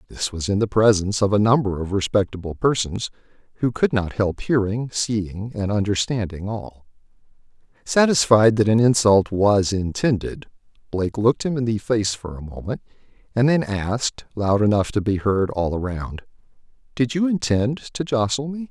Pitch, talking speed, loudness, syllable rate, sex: 110 Hz, 160 wpm, -21 LUFS, 4.9 syllables/s, male